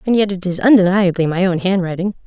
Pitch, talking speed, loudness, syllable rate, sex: 190 Hz, 210 wpm, -15 LUFS, 6.3 syllables/s, female